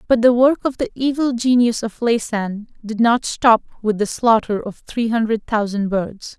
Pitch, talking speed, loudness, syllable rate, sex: 230 Hz, 190 wpm, -18 LUFS, 4.5 syllables/s, female